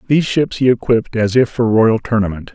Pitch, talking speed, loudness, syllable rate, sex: 115 Hz, 210 wpm, -15 LUFS, 5.9 syllables/s, male